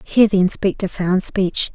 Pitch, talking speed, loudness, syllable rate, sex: 190 Hz, 170 wpm, -18 LUFS, 4.9 syllables/s, female